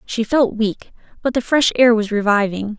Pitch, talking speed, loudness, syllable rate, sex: 225 Hz, 195 wpm, -17 LUFS, 4.7 syllables/s, female